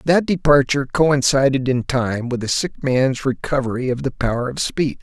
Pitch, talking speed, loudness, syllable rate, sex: 135 Hz, 180 wpm, -19 LUFS, 4.9 syllables/s, male